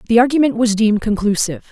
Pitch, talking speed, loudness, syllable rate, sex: 220 Hz, 175 wpm, -15 LUFS, 7.2 syllables/s, female